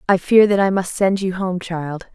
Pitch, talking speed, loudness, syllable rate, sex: 185 Hz, 250 wpm, -18 LUFS, 4.6 syllables/s, female